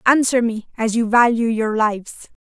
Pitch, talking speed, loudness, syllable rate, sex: 230 Hz, 170 wpm, -18 LUFS, 4.9 syllables/s, female